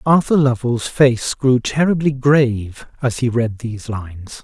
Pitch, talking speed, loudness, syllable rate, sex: 125 Hz, 150 wpm, -17 LUFS, 4.3 syllables/s, male